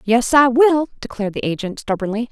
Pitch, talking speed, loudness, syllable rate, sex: 235 Hz, 180 wpm, -17 LUFS, 5.7 syllables/s, female